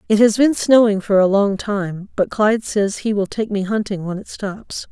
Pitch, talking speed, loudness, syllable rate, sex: 205 Hz, 230 wpm, -18 LUFS, 4.7 syllables/s, female